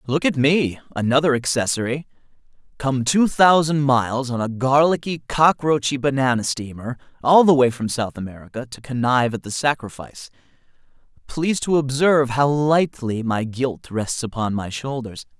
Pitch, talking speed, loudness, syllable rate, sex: 130 Hz, 140 wpm, -20 LUFS, 5.0 syllables/s, male